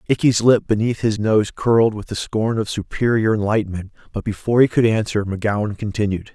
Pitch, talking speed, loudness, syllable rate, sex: 110 Hz, 180 wpm, -19 LUFS, 6.0 syllables/s, male